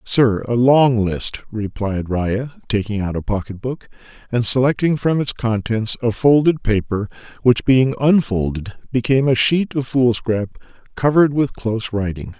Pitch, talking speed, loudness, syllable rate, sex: 120 Hz, 150 wpm, -18 LUFS, 4.5 syllables/s, male